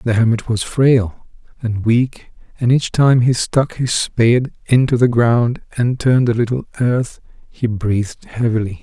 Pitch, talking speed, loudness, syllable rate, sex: 120 Hz, 165 wpm, -16 LUFS, 4.3 syllables/s, male